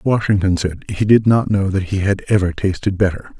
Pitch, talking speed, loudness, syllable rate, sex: 100 Hz, 210 wpm, -17 LUFS, 5.4 syllables/s, male